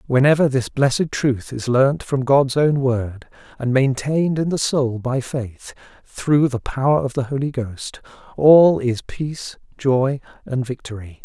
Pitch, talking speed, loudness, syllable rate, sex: 130 Hz, 160 wpm, -19 LUFS, 4.2 syllables/s, male